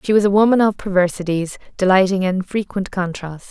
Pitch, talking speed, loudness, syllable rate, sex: 190 Hz, 170 wpm, -18 LUFS, 5.6 syllables/s, female